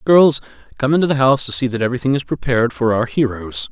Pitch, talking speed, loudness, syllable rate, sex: 130 Hz, 225 wpm, -17 LUFS, 6.8 syllables/s, male